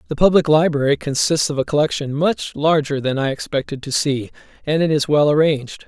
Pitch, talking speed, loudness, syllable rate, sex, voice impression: 145 Hz, 195 wpm, -18 LUFS, 5.7 syllables/s, male, very masculine, slightly young, very adult-like, slightly thick, very tensed, powerful, bright, hard, clear, fluent, slightly raspy, cool, very intellectual, refreshing, sincere, calm, mature, friendly, reassuring, unique, elegant, slightly wild, slightly sweet, lively, kind, slightly modest